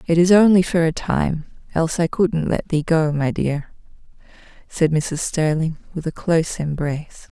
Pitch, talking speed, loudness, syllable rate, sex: 160 Hz, 170 wpm, -20 LUFS, 4.7 syllables/s, female